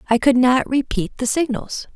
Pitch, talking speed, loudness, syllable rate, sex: 250 Hz, 185 wpm, -19 LUFS, 4.7 syllables/s, female